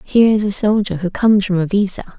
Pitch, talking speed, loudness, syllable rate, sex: 195 Hz, 220 wpm, -16 LUFS, 6.6 syllables/s, female